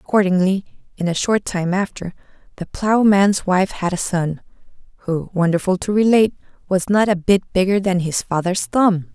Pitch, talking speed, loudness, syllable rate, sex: 185 Hz, 165 wpm, -18 LUFS, 5.0 syllables/s, female